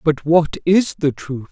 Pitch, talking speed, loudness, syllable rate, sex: 160 Hz, 200 wpm, -17 LUFS, 3.9 syllables/s, female